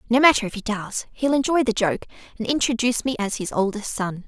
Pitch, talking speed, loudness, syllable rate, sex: 235 Hz, 225 wpm, -22 LUFS, 6.0 syllables/s, female